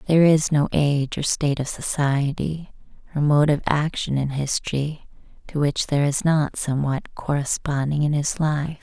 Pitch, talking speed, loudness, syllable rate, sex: 145 Hz, 165 wpm, -22 LUFS, 4.9 syllables/s, female